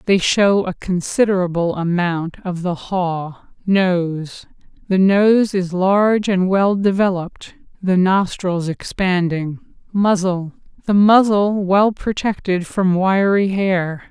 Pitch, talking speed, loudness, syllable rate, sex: 185 Hz, 105 wpm, -17 LUFS, 3.6 syllables/s, female